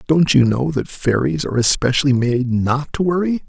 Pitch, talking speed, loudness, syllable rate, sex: 135 Hz, 190 wpm, -17 LUFS, 5.1 syllables/s, male